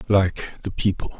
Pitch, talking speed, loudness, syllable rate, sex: 95 Hz, 150 wpm, -24 LUFS, 4.0 syllables/s, male